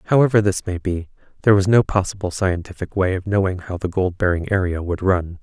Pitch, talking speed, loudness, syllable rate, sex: 95 Hz, 210 wpm, -20 LUFS, 6.0 syllables/s, male